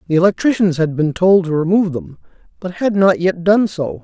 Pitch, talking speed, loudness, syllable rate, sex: 180 Hz, 210 wpm, -15 LUFS, 5.5 syllables/s, male